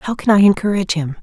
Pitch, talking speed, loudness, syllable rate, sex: 190 Hz, 245 wpm, -15 LUFS, 7.0 syllables/s, female